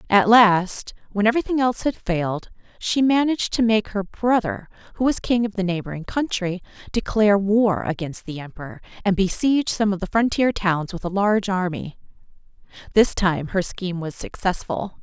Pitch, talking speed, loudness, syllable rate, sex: 200 Hz, 170 wpm, -21 LUFS, 5.3 syllables/s, female